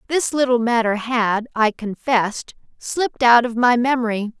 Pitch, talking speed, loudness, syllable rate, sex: 240 Hz, 150 wpm, -18 LUFS, 4.6 syllables/s, female